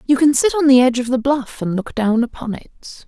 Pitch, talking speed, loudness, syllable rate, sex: 255 Hz, 275 wpm, -17 LUFS, 5.6 syllables/s, female